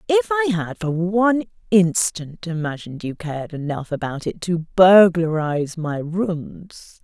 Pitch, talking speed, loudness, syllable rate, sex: 180 Hz, 135 wpm, -20 LUFS, 4.3 syllables/s, female